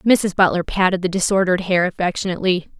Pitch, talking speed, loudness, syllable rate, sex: 185 Hz, 150 wpm, -18 LUFS, 6.5 syllables/s, female